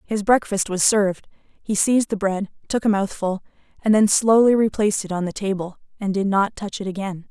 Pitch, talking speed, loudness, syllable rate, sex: 200 Hz, 205 wpm, -20 LUFS, 5.4 syllables/s, female